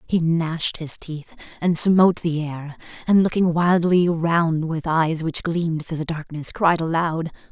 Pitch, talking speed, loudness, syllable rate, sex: 165 Hz, 170 wpm, -21 LUFS, 4.2 syllables/s, female